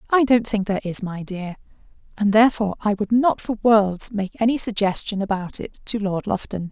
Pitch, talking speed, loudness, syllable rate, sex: 210 Hz, 195 wpm, -21 LUFS, 5.3 syllables/s, female